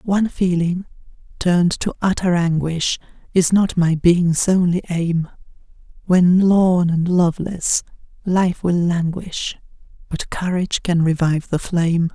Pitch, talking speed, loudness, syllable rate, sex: 175 Hz, 120 wpm, -18 LUFS, 4.2 syllables/s, female